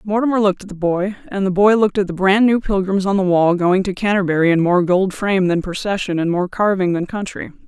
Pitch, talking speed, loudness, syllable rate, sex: 190 Hz, 240 wpm, -17 LUFS, 6.0 syllables/s, female